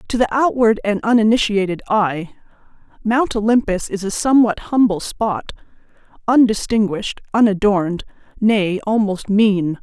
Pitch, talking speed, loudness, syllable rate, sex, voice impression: 210 Hz, 100 wpm, -17 LUFS, 4.8 syllables/s, female, feminine, adult-like, powerful, slightly hard, slightly muffled, slightly raspy, intellectual, calm, friendly, reassuring, lively, kind